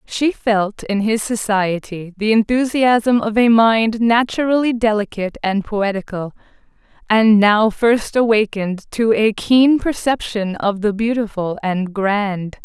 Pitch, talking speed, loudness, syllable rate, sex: 215 Hz, 130 wpm, -17 LUFS, 4.0 syllables/s, female